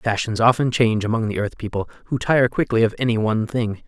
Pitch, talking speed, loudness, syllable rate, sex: 115 Hz, 215 wpm, -20 LUFS, 6.2 syllables/s, male